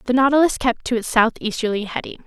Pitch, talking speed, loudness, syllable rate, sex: 240 Hz, 185 wpm, -19 LUFS, 5.8 syllables/s, female